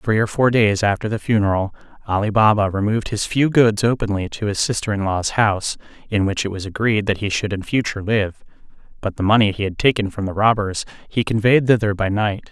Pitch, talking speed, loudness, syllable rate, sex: 105 Hz, 215 wpm, -19 LUFS, 5.8 syllables/s, male